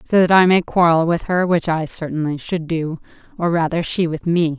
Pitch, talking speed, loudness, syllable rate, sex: 170 Hz, 210 wpm, -18 LUFS, 5.1 syllables/s, female